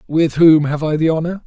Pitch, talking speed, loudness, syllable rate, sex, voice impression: 160 Hz, 245 wpm, -15 LUFS, 5.4 syllables/s, male, very masculine, very adult-like, old, very thick, slightly relaxed, weak, slightly dark, soft, muffled, slightly halting, raspy, cool, very intellectual, very sincere, very calm, very mature, friendly, reassuring, unique, slightly elegant, wild, sweet, slightly lively, very kind, slightly modest